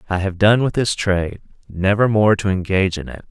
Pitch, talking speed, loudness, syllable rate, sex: 100 Hz, 220 wpm, -18 LUFS, 5.7 syllables/s, male